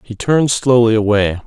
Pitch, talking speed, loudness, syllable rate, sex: 115 Hz, 165 wpm, -14 LUFS, 5.2 syllables/s, male